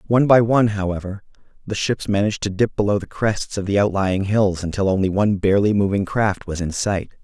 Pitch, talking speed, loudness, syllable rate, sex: 100 Hz, 205 wpm, -20 LUFS, 6.0 syllables/s, male